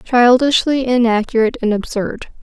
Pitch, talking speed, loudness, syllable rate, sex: 240 Hz, 100 wpm, -15 LUFS, 5.2 syllables/s, female